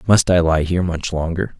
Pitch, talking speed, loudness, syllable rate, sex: 85 Hz, 225 wpm, -18 LUFS, 5.7 syllables/s, male